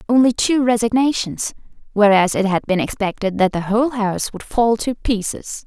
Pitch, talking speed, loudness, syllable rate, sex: 220 Hz, 160 wpm, -18 LUFS, 5.1 syllables/s, female